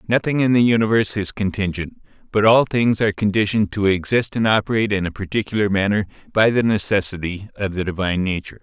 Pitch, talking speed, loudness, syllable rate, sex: 100 Hz, 180 wpm, -19 LUFS, 6.5 syllables/s, male